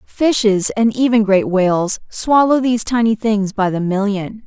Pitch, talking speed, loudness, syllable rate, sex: 215 Hz, 160 wpm, -16 LUFS, 4.4 syllables/s, female